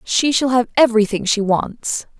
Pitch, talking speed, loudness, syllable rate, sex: 230 Hz, 165 wpm, -17 LUFS, 4.7 syllables/s, female